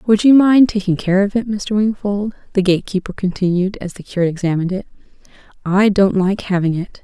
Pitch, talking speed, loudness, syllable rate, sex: 195 Hz, 195 wpm, -16 LUFS, 5.8 syllables/s, female